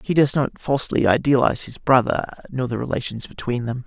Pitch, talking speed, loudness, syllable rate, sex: 130 Hz, 185 wpm, -21 LUFS, 5.7 syllables/s, male